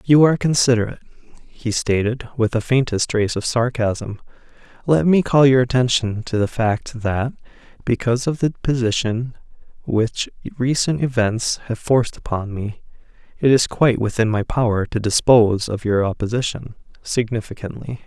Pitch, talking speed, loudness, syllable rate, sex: 115 Hz, 140 wpm, -19 LUFS, 5.1 syllables/s, male